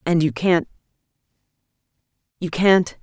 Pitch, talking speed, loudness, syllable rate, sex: 165 Hz, 80 wpm, -19 LUFS, 4.4 syllables/s, female